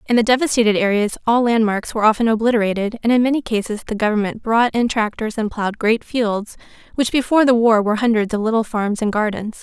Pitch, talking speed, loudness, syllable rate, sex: 220 Hz, 205 wpm, -18 LUFS, 6.3 syllables/s, female